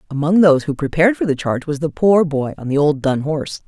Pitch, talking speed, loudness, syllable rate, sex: 155 Hz, 260 wpm, -17 LUFS, 6.5 syllables/s, female